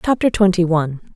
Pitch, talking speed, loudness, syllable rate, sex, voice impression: 185 Hz, 155 wpm, -17 LUFS, 6.5 syllables/s, female, feminine, adult-like, tensed, powerful, slightly hard, clear, intellectual, friendly, elegant, lively, slightly strict, slightly sharp